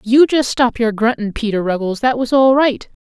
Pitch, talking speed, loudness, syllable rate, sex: 235 Hz, 220 wpm, -15 LUFS, 5.0 syllables/s, female